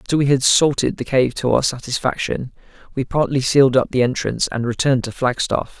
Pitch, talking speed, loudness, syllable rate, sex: 130 Hz, 195 wpm, -18 LUFS, 5.8 syllables/s, male